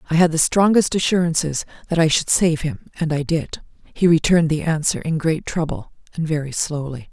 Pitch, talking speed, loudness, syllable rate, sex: 160 Hz, 195 wpm, -19 LUFS, 5.5 syllables/s, female